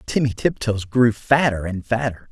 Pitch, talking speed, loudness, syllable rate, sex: 115 Hz, 155 wpm, -20 LUFS, 4.6 syllables/s, male